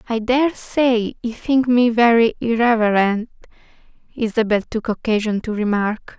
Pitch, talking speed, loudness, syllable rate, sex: 230 Hz, 125 wpm, -18 LUFS, 4.4 syllables/s, female